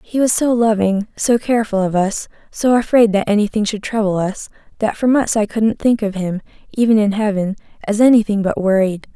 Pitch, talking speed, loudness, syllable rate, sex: 215 Hz, 195 wpm, -16 LUFS, 5.4 syllables/s, female